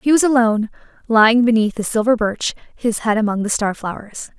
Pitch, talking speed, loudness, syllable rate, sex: 225 Hz, 190 wpm, -17 LUFS, 5.7 syllables/s, female